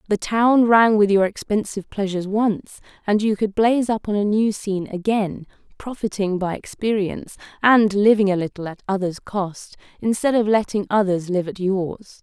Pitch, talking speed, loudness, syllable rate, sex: 205 Hz, 170 wpm, -20 LUFS, 5.0 syllables/s, female